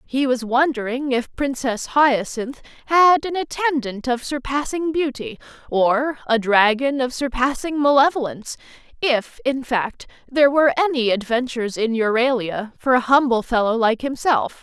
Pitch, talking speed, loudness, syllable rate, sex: 255 Hz, 130 wpm, -19 LUFS, 4.6 syllables/s, female